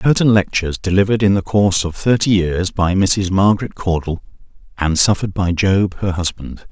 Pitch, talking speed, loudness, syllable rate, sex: 95 Hz, 170 wpm, -16 LUFS, 5.4 syllables/s, male